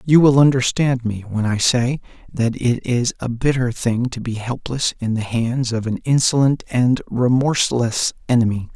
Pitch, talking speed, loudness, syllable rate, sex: 125 Hz, 170 wpm, -19 LUFS, 4.6 syllables/s, male